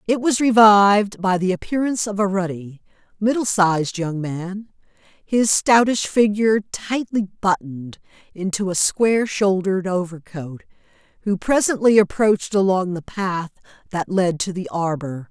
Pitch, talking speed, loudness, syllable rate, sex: 195 Hz, 135 wpm, -19 LUFS, 4.6 syllables/s, female